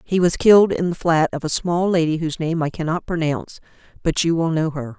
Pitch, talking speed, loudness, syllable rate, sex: 165 Hz, 240 wpm, -19 LUFS, 5.9 syllables/s, female